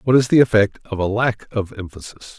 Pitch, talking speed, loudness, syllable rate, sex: 110 Hz, 225 wpm, -18 LUFS, 5.5 syllables/s, male